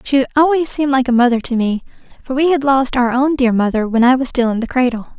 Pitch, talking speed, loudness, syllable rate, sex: 255 Hz, 265 wpm, -15 LUFS, 6.1 syllables/s, female